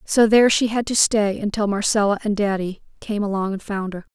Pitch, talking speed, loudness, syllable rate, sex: 205 Hz, 215 wpm, -20 LUFS, 5.6 syllables/s, female